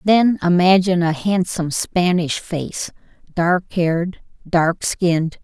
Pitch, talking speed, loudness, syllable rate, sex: 175 Hz, 100 wpm, -18 LUFS, 3.9 syllables/s, female